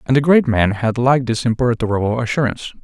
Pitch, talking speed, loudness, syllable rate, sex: 120 Hz, 190 wpm, -17 LUFS, 6.5 syllables/s, male